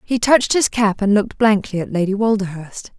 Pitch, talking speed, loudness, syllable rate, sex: 205 Hz, 200 wpm, -17 LUFS, 5.6 syllables/s, female